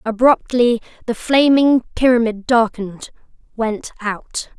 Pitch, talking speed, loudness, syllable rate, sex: 235 Hz, 80 wpm, -17 LUFS, 3.9 syllables/s, female